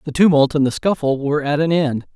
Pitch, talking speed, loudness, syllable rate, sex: 150 Hz, 250 wpm, -17 LUFS, 6.0 syllables/s, male